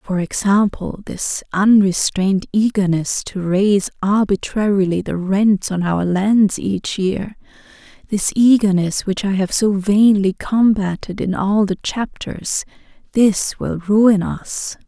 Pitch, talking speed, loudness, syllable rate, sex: 200 Hz, 125 wpm, -17 LUFS, 3.8 syllables/s, female